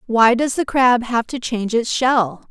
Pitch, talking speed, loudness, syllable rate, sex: 235 Hz, 215 wpm, -17 LUFS, 4.4 syllables/s, female